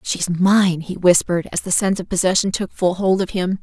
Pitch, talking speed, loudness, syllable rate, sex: 185 Hz, 230 wpm, -18 LUFS, 5.4 syllables/s, female